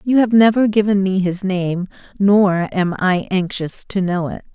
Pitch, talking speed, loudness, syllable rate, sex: 190 Hz, 185 wpm, -17 LUFS, 4.3 syllables/s, female